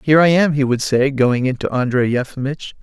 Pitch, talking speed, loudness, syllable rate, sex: 135 Hz, 235 wpm, -17 LUFS, 5.6 syllables/s, male